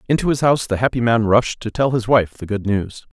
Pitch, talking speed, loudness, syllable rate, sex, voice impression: 115 Hz, 265 wpm, -18 LUFS, 6.0 syllables/s, male, masculine, adult-like, tensed, powerful, clear, slightly raspy, cool, intellectual, calm, slightly mature, reassuring, wild, lively, slightly sharp